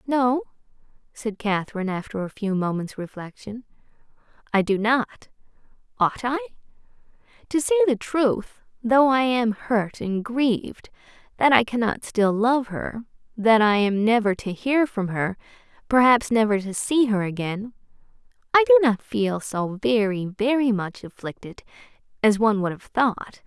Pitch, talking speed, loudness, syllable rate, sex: 220 Hz, 145 wpm, -22 LUFS, 4.6 syllables/s, female